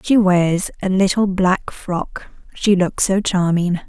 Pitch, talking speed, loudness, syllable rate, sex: 185 Hz, 155 wpm, -17 LUFS, 3.5 syllables/s, female